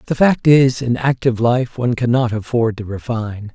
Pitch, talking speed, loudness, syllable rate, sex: 120 Hz, 185 wpm, -17 LUFS, 5.3 syllables/s, male